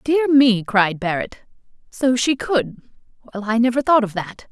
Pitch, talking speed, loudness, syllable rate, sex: 235 Hz, 175 wpm, -18 LUFS, 4.5 syllables/s, female